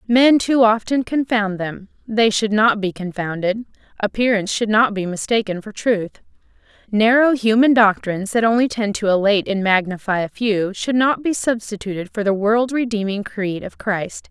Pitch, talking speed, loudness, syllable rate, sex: 215 Hz, 170 wpm, -18 LUFS, 4.9 syllables/s, female